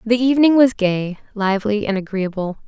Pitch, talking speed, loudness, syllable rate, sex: 215 Hz, 155 wpm, -18 LUFS, 5.4 syllables/s, female